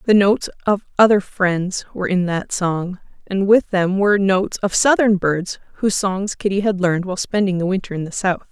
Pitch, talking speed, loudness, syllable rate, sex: 190 Hz, 205 wpm, -18 LUFS, 5.5 syllables/s, female